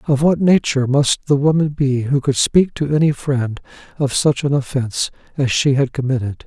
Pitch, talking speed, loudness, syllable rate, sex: 140 Hz, 195 wpm, -17 LUFS, 5.2 syllables/s, male